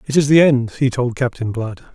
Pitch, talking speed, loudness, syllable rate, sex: 125 Hz, 245 wpm, -17 LUFS, 5.3 syllables/s, male